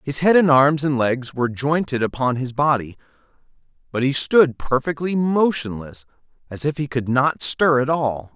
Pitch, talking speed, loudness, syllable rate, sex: 140 Hz, 170 wpm, -19 LUFS, 4.7 syllables/s, male